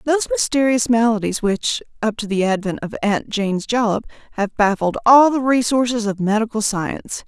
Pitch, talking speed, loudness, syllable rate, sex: 225 Hz, 165 wpm, -18 LUFS, 5.2 syllables/s, female